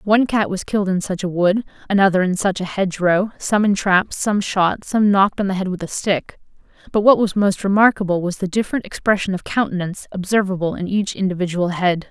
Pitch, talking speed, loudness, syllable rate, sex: 195 Hz, 215 wpm, -19 LUFS, 5.8 syllables/s, female